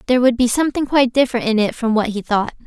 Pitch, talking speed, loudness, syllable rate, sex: 240 Hz, 270 wpm, -17 LUFS, 7.5 syllables/s, female